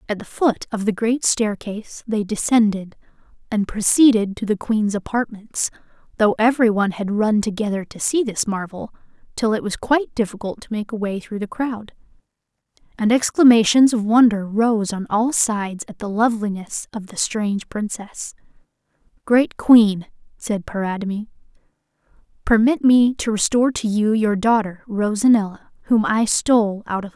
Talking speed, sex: 155 wpm, female